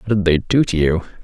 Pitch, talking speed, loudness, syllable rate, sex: 95 Hz, 290 wpm, -17 LUFS, 7.1 syllables/s, male